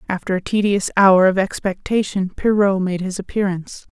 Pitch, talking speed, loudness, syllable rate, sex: 195 Hz, 150 wpm, -18 LUFS, 5.3 syllables/s, female